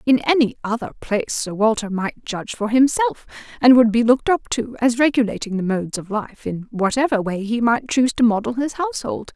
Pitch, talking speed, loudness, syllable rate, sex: 235 Hz, 205 wpm, -19 LUFS, 5.8 syllables/s, female